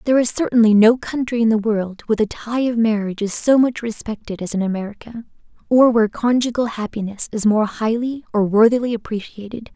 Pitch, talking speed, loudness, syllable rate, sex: 225 Hz, 185 wpm, -18 LUFS, 5.9 syllables/s, female